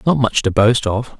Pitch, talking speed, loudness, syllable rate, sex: 115 Hz, 250 wpm, -16 LUFS, 4.7 syllables/s, male